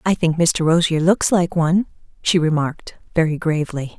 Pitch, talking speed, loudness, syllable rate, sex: 165 Hz, 165 wpm, -18 LUFS, 5.3 syllables/s, female